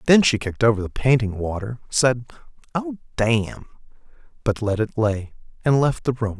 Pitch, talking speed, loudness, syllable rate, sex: 115 Hz, 150 wpm, -22 LUFS, 5.0 syllables/s, male